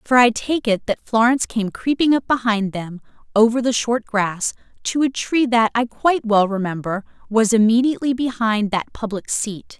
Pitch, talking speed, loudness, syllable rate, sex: 225 Hz, 180 wpm, -19 LUFS, 4.9 syllables/s, female